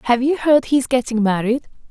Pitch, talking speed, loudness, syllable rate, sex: 250 Hz, 220 wpm, -18 LUFS, 6.2 syllables/s, female